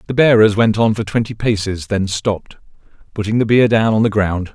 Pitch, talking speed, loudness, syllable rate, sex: 105 Hz, 210 wpm, -15 LUFS, 5.5 syllables/s, male